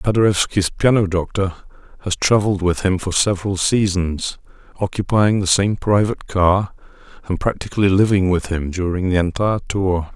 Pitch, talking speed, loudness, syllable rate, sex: 95 Hz, 140 wpm, -18 LUFS, 5.2 syllables/s, male